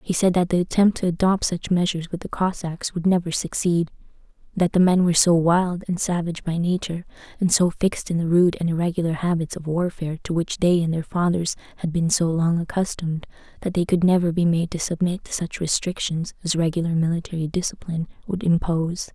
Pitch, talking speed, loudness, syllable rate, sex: 170 Hz, 205 wpm, -22 LUFS, 5.9 syllables/s, female